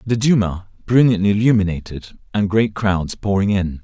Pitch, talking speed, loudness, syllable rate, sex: 100 Hz, 140 wpm, -18 LUFS, 5.0 syllables/s, male